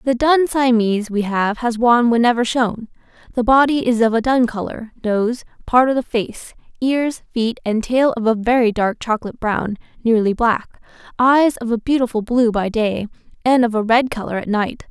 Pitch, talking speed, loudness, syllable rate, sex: 235 Hz, 190 wpm, -17 LUFS, 4.9 syllables/s, female